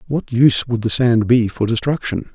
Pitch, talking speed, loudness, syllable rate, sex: 120 Hz, 205 wpm, -17 LUFS, 5.1 syllables/s, male